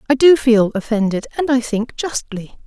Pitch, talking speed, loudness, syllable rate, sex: 240 Hz, 180 wpm, -16 LUFS, 4.9 syllables/s, female